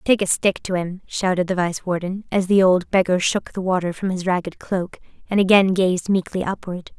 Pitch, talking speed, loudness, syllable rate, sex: 185 Hz, 215 wpm, -20 LUFS, 5.2 syllables/s, female